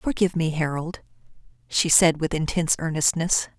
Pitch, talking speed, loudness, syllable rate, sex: 160 Hz, 135 wpm, -22 LUFS, 5.4 syllables/s, female